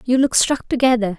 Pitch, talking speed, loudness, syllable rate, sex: 240 Hz, 205 wpm, -17 LUFS, 5.5 syllables/s, female